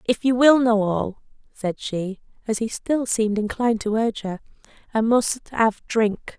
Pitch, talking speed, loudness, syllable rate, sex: 225 Hz, 180 wpm, -22 LUFS, 4.5 syllables/s, female